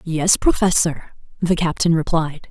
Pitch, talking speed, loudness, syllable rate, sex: 170 Hz, 120 wpm, -18 LUFS, 4.2 syllables/s, female